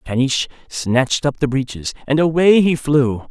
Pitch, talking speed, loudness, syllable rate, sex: 140 Hz, 165 wpm, -17 LUFS, 4.9 syllables/s, male